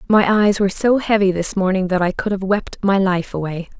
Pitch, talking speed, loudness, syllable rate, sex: 195 Hz, 235 wpm, -18 LUFS, 5.3 syllables/s, female